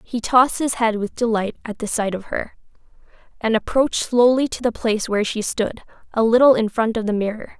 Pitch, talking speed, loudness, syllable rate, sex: 225 Hz, 215 wpm, -20 LUFS, 5.8 syllables/s, female